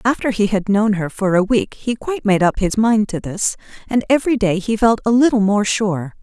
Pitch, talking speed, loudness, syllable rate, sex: 210 Hz, 240 wpm, -17 LUFS, 5.4 syllables/s, female